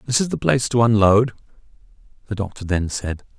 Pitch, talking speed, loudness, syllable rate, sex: 110 Hz, 175 wpm, -19 LUFS, 6.1 syllables/s, male